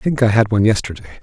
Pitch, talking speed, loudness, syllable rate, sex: 105 Hz, 295 wpm, -16 LUFS, 8.9 syllables/s, male